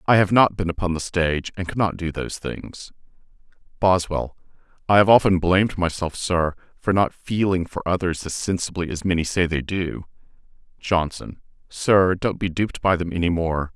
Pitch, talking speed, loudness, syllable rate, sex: 90 Hz, 175 wpm, -21 LUFS, 5.1 syllables/s, male